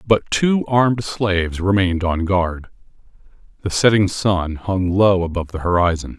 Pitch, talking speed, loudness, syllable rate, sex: 95 Hz, 145 wpm, -18 LUFS, 4.8 syllables/s, male